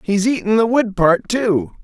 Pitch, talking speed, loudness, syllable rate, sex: 200 Hz, 195 wpm, -16 LUFS, 4.2 syllables/s, male